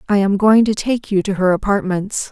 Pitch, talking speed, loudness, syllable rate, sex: 200 Hz, 235 wpm, -16 LUFS, 5.2 syllables/s, female